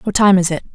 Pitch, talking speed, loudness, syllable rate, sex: 190 Hz, 325 wpm, -14 LUFS, 7.4 syllables/s, female